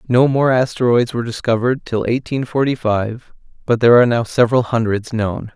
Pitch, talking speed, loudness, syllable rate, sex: 120 Hz, 175 wpm, -16 LUFS, 5.8 syllables/s, male